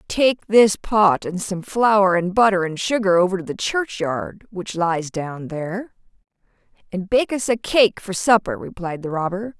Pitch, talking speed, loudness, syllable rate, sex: 195 Hz, 175 wpm, -20 LUFS, 4.3 syllables/s, female